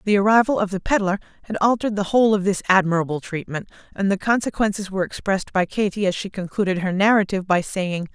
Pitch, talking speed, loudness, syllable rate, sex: 195 Hz, 200 wpm, -21 LUFS, 6.7 syllables/s, female